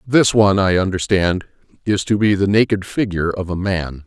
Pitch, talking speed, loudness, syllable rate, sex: 95 Hz, 190 wpm, -17 LUFS, 5.3 syllables/s, male